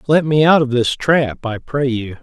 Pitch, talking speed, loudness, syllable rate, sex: 140 Hz, 240 wpm, -16 LUFS, 4.4 syllables/s, male